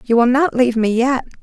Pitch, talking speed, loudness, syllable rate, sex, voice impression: 245 Hz, 255 wpm, -16 LUFS, 6.0 syllables/s, female, feminine, adult-like, tensed, powerful, bright, slightly soft, clear, slightly raspy, intellectual, calm, friendly, reassuring, elegant, lively, slightly kind